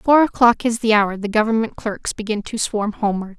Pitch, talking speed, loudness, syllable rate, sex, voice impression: 220 Hz, 215 wpm, -19 LUFS, 5.4 syllables/s, female, feminine, adult-like, clear, fluent, slightly intellectual, slightly refreshing